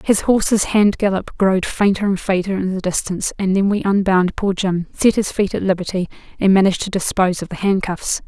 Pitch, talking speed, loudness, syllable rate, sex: 190 Hz, 210 wpm, -18 LUFS, 5.7 syllables/s, female